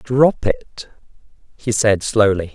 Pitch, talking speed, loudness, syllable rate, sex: 110 Hz, 120 wpm, -17 LUFS, 3.2 syllables/s, male